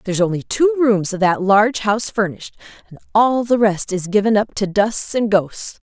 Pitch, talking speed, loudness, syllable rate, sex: 205 Hz, 205 wpm, -17 LUFS, 5.4 syllables/s, female